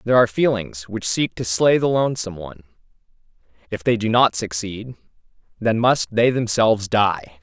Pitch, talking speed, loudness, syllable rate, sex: 105 Hz, 160 wpm, -19 LUFS, 5.4 syllables/s, male